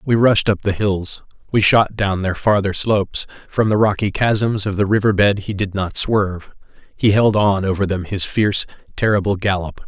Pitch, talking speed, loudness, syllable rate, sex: 100 Hz, 195 wpm, -18 LUFS, 4.9 syllables/s, male